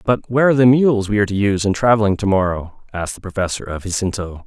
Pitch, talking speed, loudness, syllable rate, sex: 105 Hz, 240 wpm, -17 LUFS, 7.2 syllables/s, male